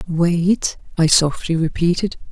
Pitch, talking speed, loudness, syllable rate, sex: 170 Hz, 105 wpm, -18 LUFS, 3.8 syllables/s, female